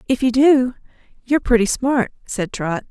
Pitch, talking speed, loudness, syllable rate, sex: 240 Hz, 165 wpm, -18 LUFS, 4.8 syllables/s, female